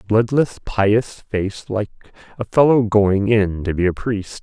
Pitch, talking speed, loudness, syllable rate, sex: 105 Hz, 165 wpm, -18 LUFS, 3.8 syllables/s, male